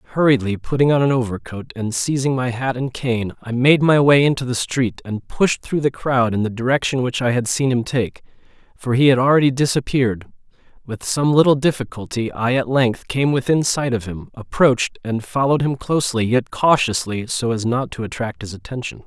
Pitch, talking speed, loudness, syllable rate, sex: 125 Hz, 200 wpm, -19 LUFS, 5.3 syllables/s, male